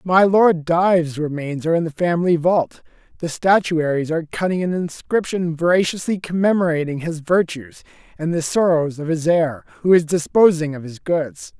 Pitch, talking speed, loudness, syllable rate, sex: 165 Hz, 160 wpm, -19 LUFS, 5.0 syllables/s, male